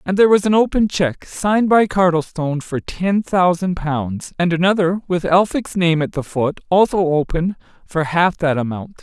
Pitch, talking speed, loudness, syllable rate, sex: 175 Hz, 180 wpm, -17 LUFS, 4.9 syllables/s, male